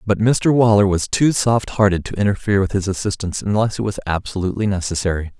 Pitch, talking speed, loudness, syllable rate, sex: 100 Hz, 190 wpm, -18 LUFS, 6.2 syllables/s, male